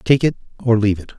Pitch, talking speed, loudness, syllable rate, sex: 115 Hz, 255 wpm, -18 LUFS, 7.1 syllables/s, male